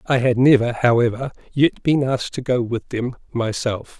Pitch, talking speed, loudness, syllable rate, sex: 125 Hz, 180 wpm, -20 LUFS, 4.9 syllables/s, male